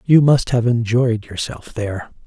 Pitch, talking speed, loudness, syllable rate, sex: 120 Hz, 160 wpm, -18 LUFS, 4.4 syllables/s, male